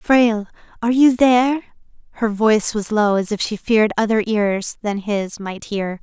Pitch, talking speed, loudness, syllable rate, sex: 215 Hz, 180 wpm, -18 LUFS, 5.0 syllables/s, female